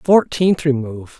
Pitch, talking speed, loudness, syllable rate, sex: 145 Hz, 150 wpm, -17 LUFS, 5.6 syllables/s, male